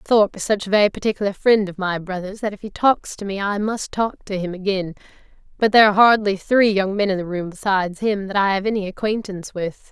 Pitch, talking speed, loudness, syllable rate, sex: 200 Hz, 240 wpm, -20 LUFS, 6.1 syllables/s, female